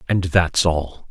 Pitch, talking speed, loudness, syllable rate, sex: 85 Hz, 165 wpm, -19 LUFS, 3.2 syllables/s, male